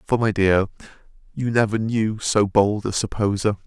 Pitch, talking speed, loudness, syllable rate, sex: 105 Hz, 165 wpm, -21 LUFS, 4.7 syllables/s, male